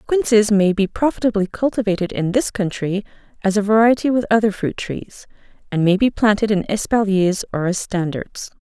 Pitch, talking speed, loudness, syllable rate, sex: 205 Hz, 165 wpm, -18 LUFS, 5.2 syllables/s, female